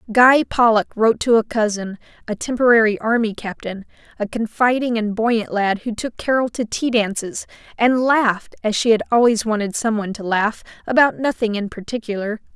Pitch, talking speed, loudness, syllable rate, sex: 225 Hz, 170 wpm, -19 LUFS, 5.2 syllables/s, female